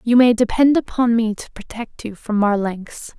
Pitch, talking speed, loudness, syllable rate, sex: 225 Hz, 190 wpm, -17 LUFS, 4.5 syllables/s, female